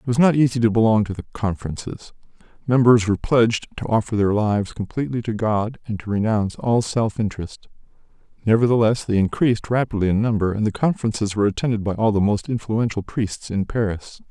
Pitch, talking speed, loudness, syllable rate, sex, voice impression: 110 Hz, 185 wpm, -21 LUFS, 6.2 syllables/s, male, very masculine, very middle-aged, very thick, relaxed, weak, dark, very soft, slightly muffled, fluent, very cool, very intellectual, sincere, very calm, very mature, very friendly, very reassuring, unique, elegant, wild, sweet, slightly lively, kind, modest